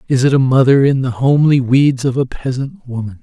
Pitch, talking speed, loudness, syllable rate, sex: 130 Hz, 225 wpm, -14 LUFS, 5.8 syllables/s, male